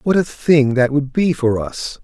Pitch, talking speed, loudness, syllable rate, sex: 145 Hz, 235 wpm, -17 LUFS, 4.2 syllables/s, male